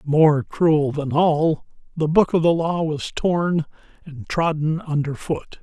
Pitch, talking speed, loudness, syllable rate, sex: 155 Hz, 150 wpm, -20 LUFS, 3.5 syllables/s, male